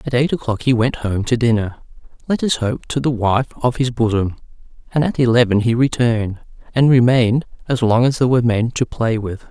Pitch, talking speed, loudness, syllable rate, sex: 120 Hz, 210 wpm, -17 LUFS, 5.6 syllables/s, male